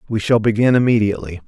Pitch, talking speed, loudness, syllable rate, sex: 105 Hz, 165 wpm, -16 LUFS, 7.1 syllables/s, male